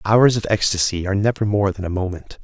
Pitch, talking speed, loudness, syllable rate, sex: 100 Hz, 220 wpm, -19 LUFS, 6.1 syllables/s, male